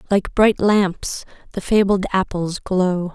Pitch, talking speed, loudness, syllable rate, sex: 190 Hz, 135 wpm, -19 LUFS, 3.5 syllables/s, female